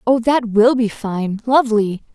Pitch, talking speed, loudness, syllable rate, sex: 230 Hz, 140 wpm, -16 LUFS, 4.2 syllables/s, female